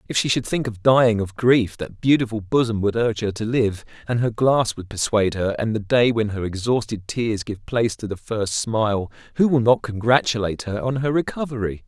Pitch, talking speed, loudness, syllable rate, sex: 115 Hz, 215 wpm, -21 LUFS, 5.5 syllables/s, male